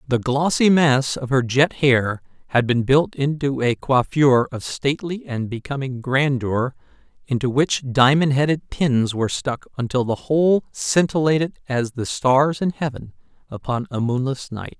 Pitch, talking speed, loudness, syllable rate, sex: 135 Hz, 155 wpm, -20 LUFS, 4.5 syllables/s, male